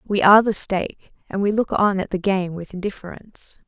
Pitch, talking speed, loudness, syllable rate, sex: 195 Hz, 210 wpm, -20 LUFS, 5.7 syllables/s, female